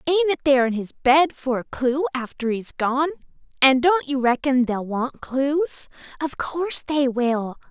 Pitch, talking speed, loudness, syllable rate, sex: 275 Hz, 180 wpm, -21 LUFS, 4.3 syllables/s, female